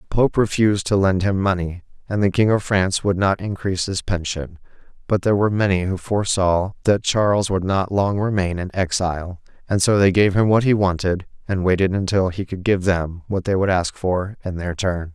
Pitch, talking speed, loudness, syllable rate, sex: 95 Hz, 215 wpm, -20 LUFS, 5.4 syllables/s, male